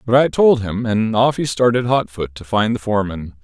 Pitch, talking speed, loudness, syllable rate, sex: 110 Hz, 245 wpm, -17 LUFS, 5.2 syllables/s, male